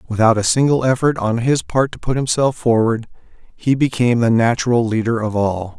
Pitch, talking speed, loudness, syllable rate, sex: 120 Hz, 185 wpm, -17 LUFS, 5.4 syllables/s, male